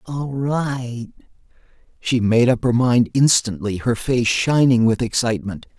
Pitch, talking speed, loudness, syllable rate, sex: 120 Hz, 135 wpm, -18 LUFS, 4.2 syllables/s, male